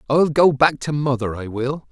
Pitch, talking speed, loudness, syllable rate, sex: 140 Hz, 220 wpm, -19 LUFS, 4.6 syllables/s, male